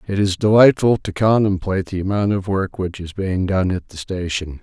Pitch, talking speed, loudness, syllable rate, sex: 95 Hz, 205 wpm, -18 LUFS, 5.2 syllables/s, male